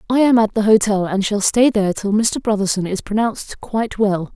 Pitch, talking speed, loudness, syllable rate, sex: 210 Hz, 220 wpm, -17 LUFS, 5.5 syllables/s, female